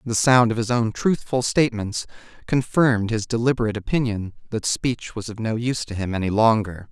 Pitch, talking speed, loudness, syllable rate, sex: 115 Hz, 180 wpm, -22 LUFS, 5.6 syllables/s, male